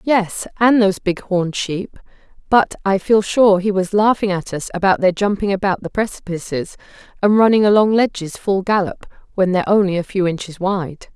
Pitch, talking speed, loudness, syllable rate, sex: 195 Hz, 185 wpm, -17 LUFS, 5.2 syllables/s, female